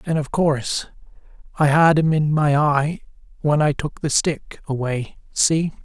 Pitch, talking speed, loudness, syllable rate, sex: 150 Hz, 155 wpm, -20 LUFS, 4.2 syllables/s, male